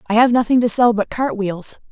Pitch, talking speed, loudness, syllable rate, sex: 225 Hz, 250 wpm, -16 LUFS, 5.3 syllables/s, female